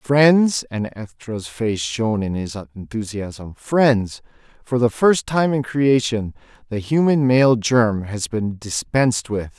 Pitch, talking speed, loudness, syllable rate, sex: 115 Hz, 130 wpm, -19 LUFS, 3.6 syllables/s, male